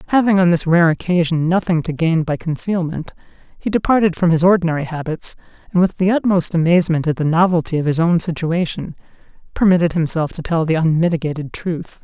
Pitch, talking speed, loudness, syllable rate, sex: 170 Hz, 175 wpm, -17 LUFS, 6.0 syllables/s, female